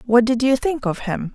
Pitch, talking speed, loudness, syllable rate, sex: 240 Hz, 270 wpm, -20 LUFS, 5.0 syllables/s, female